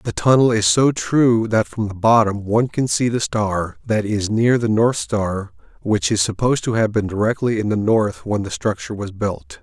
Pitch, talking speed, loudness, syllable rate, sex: 110 Hz, 220 wpm, -18 LUFS, 4.8 syllables/s, male